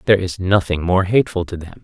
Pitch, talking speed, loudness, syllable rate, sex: 95 Hz, 230 wpm, -18 LUFS, 6.6 syllables/s, male